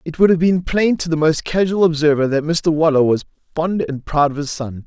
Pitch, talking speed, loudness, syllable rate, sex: 160 Hz, 245 wpm, -17 LUFS, 5.4 syllables/s, male